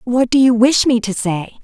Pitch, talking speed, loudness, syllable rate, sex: 240 Hz, 255 wpm, -14 LUFS, 4.8 syllables/s, female